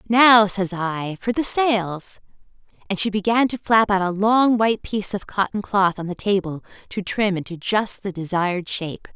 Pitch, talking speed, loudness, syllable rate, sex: 200 Hz, 190 wpm, -20 LUFS, 4.8 syllables/s, female